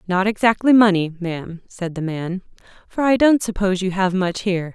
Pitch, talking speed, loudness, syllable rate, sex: 190 Hz, 190 wpm, -19 LUFS, 5.4 syllables/s, female